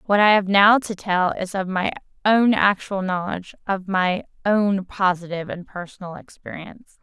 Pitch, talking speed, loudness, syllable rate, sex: 195 Hz, 155 wpm, -20 LUFS, 4.9 syllables/s, female